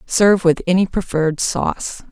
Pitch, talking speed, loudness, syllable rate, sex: 180 Hz, 140 wpm, -17 LUFS, 5.2 syllables/s, female